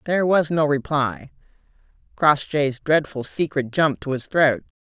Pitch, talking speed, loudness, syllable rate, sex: 145 Hz, 135 wpm, -21 LUFS, 4.6 syllables/s, female